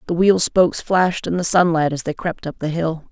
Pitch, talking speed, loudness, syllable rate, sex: 170 Hz, 250 wpm, -18 LUFS, 5.6 syllables/s, female